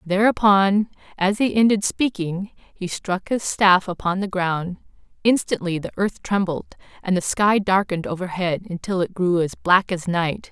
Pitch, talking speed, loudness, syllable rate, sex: 190 Hz, 160 wpm, -21 LUFS, 4.5 syllables/s, female